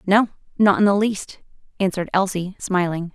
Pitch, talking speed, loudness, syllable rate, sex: 190 Hz, 155 wpm, -20 LUFS, 5.3 syllables/s, female